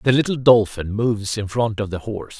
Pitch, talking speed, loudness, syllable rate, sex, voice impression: 110 Hz, 225 wpm, -20 LUFS, 5.7 syllables/s, male, masculine, adult-like, cool, sincere, calm, slightly friendly, slightly sweet